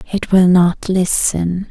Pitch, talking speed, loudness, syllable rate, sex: 180 Hz, 140 wpm, -14 LUFS, 3.5 syllables/s, female